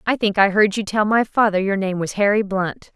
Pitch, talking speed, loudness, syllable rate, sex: 205 Hz, 265 wpm, -19 LUFS, 5.3 syllables/s, female